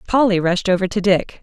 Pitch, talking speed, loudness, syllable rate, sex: 195 Hz, 210 wpm, -17 LUFS, 5.5 syllables/s, female